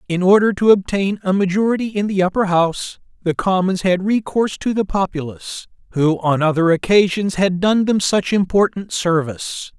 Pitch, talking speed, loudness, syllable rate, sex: 190 Hz, 165 wpm, -17 LUFS, 5.2 syllables/s, male